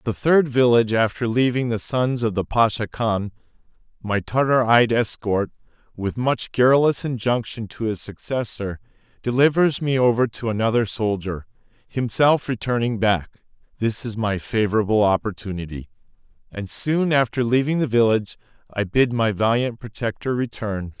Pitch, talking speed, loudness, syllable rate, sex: 115 Hz, 140 wpm, -21 LUFS, 4.9 syllables/s, male